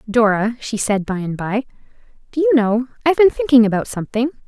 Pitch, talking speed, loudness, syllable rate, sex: 240 Hz, 190 wpm, -17 LUFS, 6.2 syllables/s, female